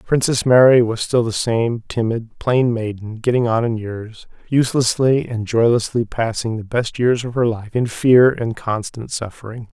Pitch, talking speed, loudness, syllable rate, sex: 115 Hz, 170 wpm, -18 LUFS, 4.5 syllables/s, male